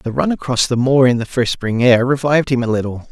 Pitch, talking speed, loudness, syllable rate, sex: 125 Hz, 270 wpm, -15 LUFS, 5.9 syllables/s, male